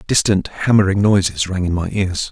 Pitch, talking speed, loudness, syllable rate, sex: 95 Hz, 180 wpm, -17 LUFS, 4.9 syllables/s, male